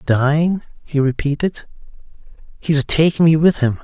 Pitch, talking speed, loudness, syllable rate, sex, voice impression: 150 Hz, 140 wpm, -17 LUFS, 5.0 syllables/s, male, masculine, adult-like, slightly weak, muffled, halting, slightly refreshing, friendly, unique, slightly kind, modest